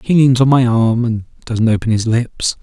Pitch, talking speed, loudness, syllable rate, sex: 120 Hz, 230 wpm, -14 LUFS, 4.8 syllables/s, male